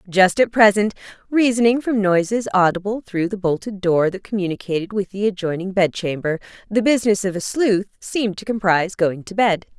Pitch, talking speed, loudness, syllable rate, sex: 200 Hz, 180 wpm, -19 LUFS, 5.5 syllables/s, female